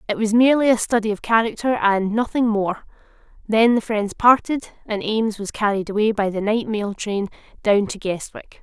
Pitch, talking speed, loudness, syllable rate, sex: 215 Hz, 190 wpm, -20 LUFS, 5.1 syllables/s, female